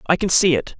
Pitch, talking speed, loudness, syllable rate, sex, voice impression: 175 Hz, 300 wpm, -17 LUFS, 6.2 syllables/s, female, very feminine, adult-like, slightly clear, intellectual, slightly sharp